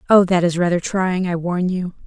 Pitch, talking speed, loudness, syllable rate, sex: 180 Hz, 230 wpm, -19 LUFS, 5.1 syllables/s, female